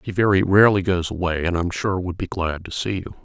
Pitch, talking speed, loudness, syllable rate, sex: 90 Hz, 280 wpm, -21 LUFS, 6.2 syllables/s, male